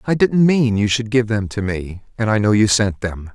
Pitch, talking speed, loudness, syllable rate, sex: 110 Hz, 270 wpm, -17 LUFS, 4.9 syllables/s, male